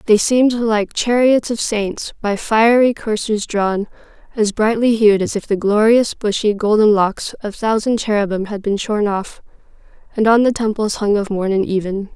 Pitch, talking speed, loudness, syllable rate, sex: 215 Hz, 180 wpm, -16 LUFS, 4.6 syllables/s, female